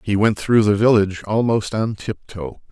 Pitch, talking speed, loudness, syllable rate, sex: 100 Hz, 175 wpm, -18 LUFS, 4.7 syllables/s, male